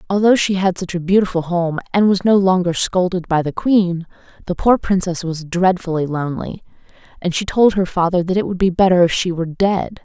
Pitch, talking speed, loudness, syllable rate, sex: 180 Hz, 210 wpm, -17 LUFS, 5.5 syllables/s, female